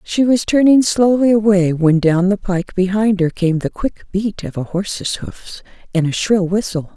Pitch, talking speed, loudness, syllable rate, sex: 195 Hz, 200 wpm, -16 LUFS, 4.5 syllables/s, female